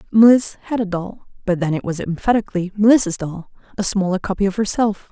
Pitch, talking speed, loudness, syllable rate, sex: 195 Hz, 175 wpm, -18 LUFS, 5.5 syllables/s, female